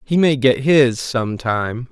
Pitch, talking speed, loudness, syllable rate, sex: 125 Hz, 190 wpm, -17 LUFS, 3.3 syllables/s, male